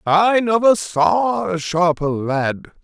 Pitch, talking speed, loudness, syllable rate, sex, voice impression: 185 Hz, 125 wpm, -17 LUFS, 3.1 syllables/s, male, very masculine, middle-aged, thick, tensed, slightly weak, bright, soft, clear, fluent, cool, intellectual, refreshing, sincere, very calm, friendly, very reassuring, unique, slightly elegant, wild, sweet, lively, kind, slightly intense